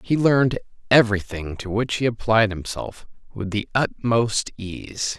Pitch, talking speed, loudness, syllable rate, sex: 110 Hz, 150 wpm, -22 LUFS, 4.3 syllables/s, male